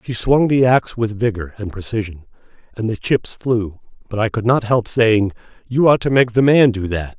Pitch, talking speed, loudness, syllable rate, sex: 115 Hz, 215 wpm, -17 LUFS, 5.1 syllables/s, male